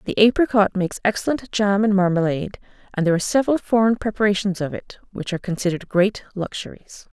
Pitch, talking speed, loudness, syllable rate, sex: 200 Hz, 165 wpm, -20 LUFS, 6.6 syllables/s, female